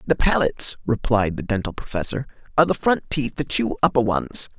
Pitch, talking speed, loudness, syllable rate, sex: 125 Hz, 185 wpm, -22 LUFS, 5.7 syllables/s, male